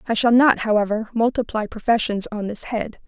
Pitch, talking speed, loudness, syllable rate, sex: 220 Hz, 175 wpm, -20 LUFS, 5.3 syllables/s, female